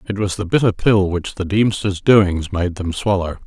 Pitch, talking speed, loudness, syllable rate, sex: 95 Hz, 210 wpm, -18 LUFS, 4.7 syllables/s, male